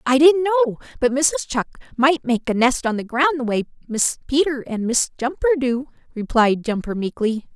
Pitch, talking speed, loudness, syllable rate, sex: 260 Hz, 190 wpm, -20 LUFS, 5.4 syllables/s, female